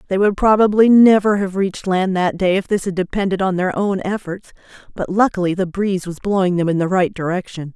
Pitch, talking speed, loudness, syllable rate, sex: 190 Hz, 215 wpm, -17 LUFS, 5.8 syllables/s, female